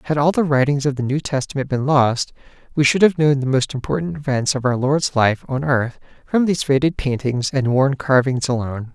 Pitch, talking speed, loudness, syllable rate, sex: 135 Hz, 215 wpm, -19 LUFS, 5.5 syllables/s, male